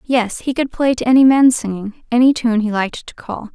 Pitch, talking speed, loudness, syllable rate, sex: 240 Hz, 220 wpm, -15 LUFS, 5.5 syllables/s, female